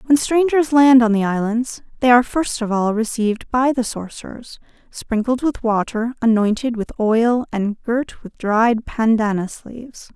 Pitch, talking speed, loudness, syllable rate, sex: 235 Hz, 160 wpm, -18 LUFS, 4.4 syllables/s, female